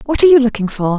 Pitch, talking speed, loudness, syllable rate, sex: 245 Hz, 305 wpm, -13 LUFS, 7.6 syllables/s, female